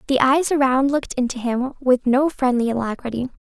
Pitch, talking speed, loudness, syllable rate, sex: 260 Hz, 175 wpm, -20 LUFS, 5.5 syllables/s, female